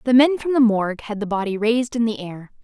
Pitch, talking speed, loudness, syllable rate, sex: 225 Hz, 275 wpm, -20 LUFS, 6.2 syllables/s, female